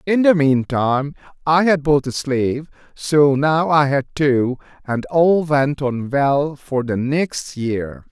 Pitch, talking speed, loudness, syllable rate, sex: 145 Hz, 170 wpm, -18 LUFS, 3.4 syllables/s, male